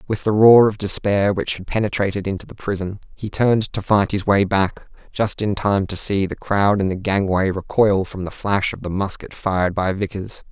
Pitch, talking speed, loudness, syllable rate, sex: 100 Hz, 215 wpm, -19 LUFS, 5.0 syllables/s, male